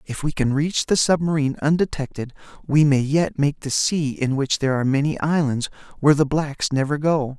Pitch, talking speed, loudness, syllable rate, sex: 145 Hz, 195 wpm, -21 LUFS, 5.4 syllables/s, male